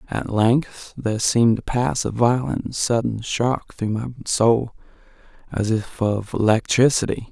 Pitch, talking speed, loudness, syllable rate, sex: 115 Hz, 150 wpm, -21 LUFS, 4.2 syllables/s, male